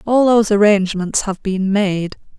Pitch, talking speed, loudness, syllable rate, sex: 200 Hz, 150 wpm, -16 LUFS, 4.8 syllables/s, female